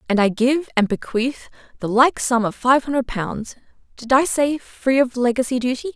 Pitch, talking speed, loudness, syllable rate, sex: 250 Hz, 180 wpm, -19 LUFS, 4.8 syllables/s, female